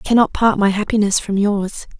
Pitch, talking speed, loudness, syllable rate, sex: 205 Hz, 210 wpm, -17 LUFS, 5.6 syllables/s, female